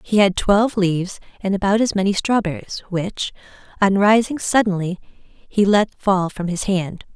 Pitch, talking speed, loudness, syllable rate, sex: 195 Hz, 160 wpm, -19 LUFS, 4.5 syllables/s, female